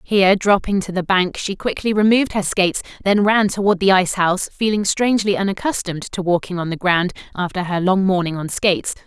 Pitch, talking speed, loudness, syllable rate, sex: 190 Hz, 200 wpm, -18 LUFS, 6.0 syllables/s, female